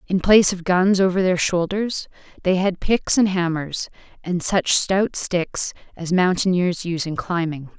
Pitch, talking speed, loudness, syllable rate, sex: 180 Hz, 160 wpm, -20 LUFS, 4.3 syllables/s, female